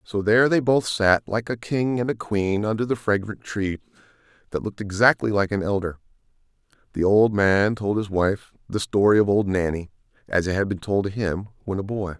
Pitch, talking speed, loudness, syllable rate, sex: 105 Hz, 200 wpm, -22 LUFS, 5.2 syllables/s, male